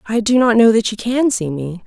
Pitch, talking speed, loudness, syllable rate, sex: 220 Hz, 290 wpm, -15 LUFS, 5.2 syllables/s, female